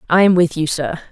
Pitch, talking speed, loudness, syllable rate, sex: 165 Hz, 270 wpm, -16 LUFS, 5.8 syllables/s, female